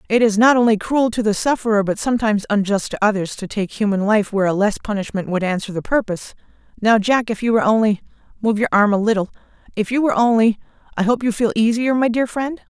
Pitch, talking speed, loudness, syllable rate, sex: 215 Hz, 210 wpm, -18 LUFS, 6.5 syllables/s, female